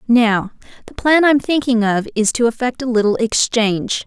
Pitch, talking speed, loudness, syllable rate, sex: 235 Hz, 175 wpm, -16 LUFS, 4.8 syllables/s, female